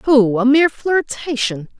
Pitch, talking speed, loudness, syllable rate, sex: 260 Hz, 135 wpm, -16 LUFS, 4.4 syllables/s, female